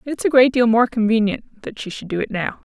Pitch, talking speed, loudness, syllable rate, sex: 230 Hz, 265 wpm, -18 LUFS, 5.5 syllables/s, female